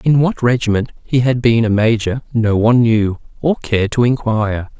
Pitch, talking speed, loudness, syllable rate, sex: 115 Hz, 190 wpm, -15 LUFS, 5.1 syllables/s, male